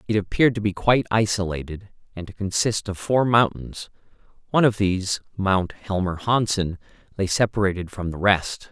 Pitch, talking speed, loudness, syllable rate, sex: 100 Hz, 160 wpm, -22 LUFS, 5.3 syllables/s, male